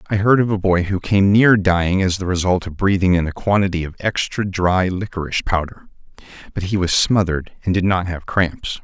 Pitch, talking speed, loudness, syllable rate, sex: 95 Hz, 210 wpm, -18 LUFS, 5.5 syllables/s, male